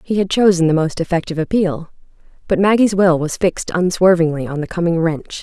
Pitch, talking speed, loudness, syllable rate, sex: 175 Hz, 190 wpm, -16 LUFS, 5.9 syllables/s, female